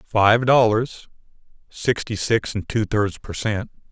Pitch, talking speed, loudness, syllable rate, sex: 110 Hz, 140 wpm, -21 LUFS, 3.7 syllables/s, male